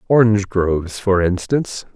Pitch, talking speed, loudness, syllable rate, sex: 100 Hz, 90 wpm, -18 LUFS, 5.3 syllables/s, male